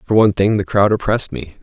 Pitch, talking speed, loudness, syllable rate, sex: 100 Hz, 260 wpm, -16 LUFS, 6.7 syllables/s, male